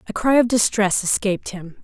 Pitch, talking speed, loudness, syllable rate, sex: 205 Hz, 195 wpm, -19 LUFS, 5.4 syllables/s, female